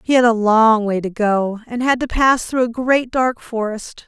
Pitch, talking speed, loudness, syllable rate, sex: 230 Hz, 235 wpm, -17 LUFS, 4.4 syllables/s, female